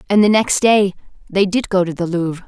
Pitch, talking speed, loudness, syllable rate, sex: 190 Hz, 240 wpm, -16 LUFS, 5.7 syllables/s, female